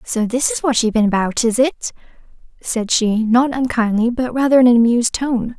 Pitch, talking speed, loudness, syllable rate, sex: 240 Hz, 205 wpm, -16 LUFS, 5.4 syllables/s, female